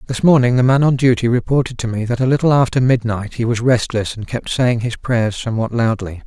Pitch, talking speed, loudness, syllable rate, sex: 120 Hz, 230 wpm, -16 LUFS, 5.8 syllables/s, male